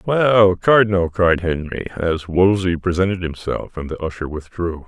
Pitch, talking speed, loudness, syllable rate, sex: 90 Hz, 150 wpm, -18 LUFS, 4.6 syllables/s, male